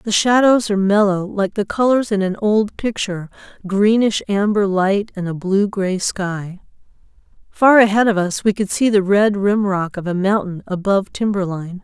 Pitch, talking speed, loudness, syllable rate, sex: 200 Hz, 175 wpm, -17 LUFS, 4.7 syllables/s, female